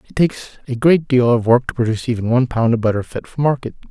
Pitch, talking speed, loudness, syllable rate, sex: 125 Hz, 260 wpm, -17 LUFS, 6.9 syllables/s, male